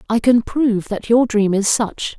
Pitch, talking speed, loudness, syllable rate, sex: 225 Hz, 220 wpm, -17 LUFS, 4.5 syllables/s, female